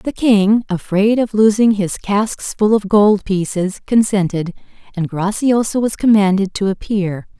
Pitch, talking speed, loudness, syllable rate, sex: 205 Hz, 145 wpm, -15 LUFS, 4.2 syllables/s, female